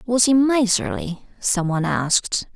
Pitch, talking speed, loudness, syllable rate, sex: 215 Hz, 140 wpm, -19 LUFS, 4.5 syllables/s, female